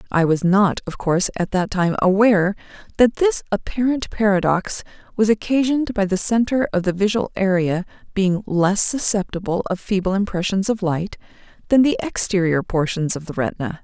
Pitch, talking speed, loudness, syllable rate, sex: 195 Hz, 160 wpm, -19 LUFS, 5.2 syllables/s, female